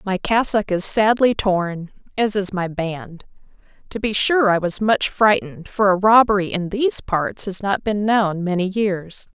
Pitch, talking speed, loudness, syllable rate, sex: 200 Hz, 180 wpm, -19 LUFS, 4.3 syllables/s, female